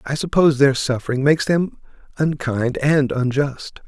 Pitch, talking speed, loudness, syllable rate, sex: 140 Hz, 140 wpm, -19 LUFS, 4.9 syllables/s, male